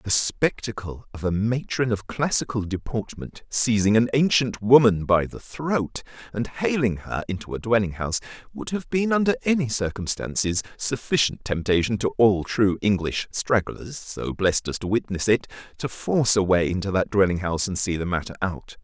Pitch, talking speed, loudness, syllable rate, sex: 110 Hz, 170 wpm, -23 LUFS, 4.9 syllables/s, male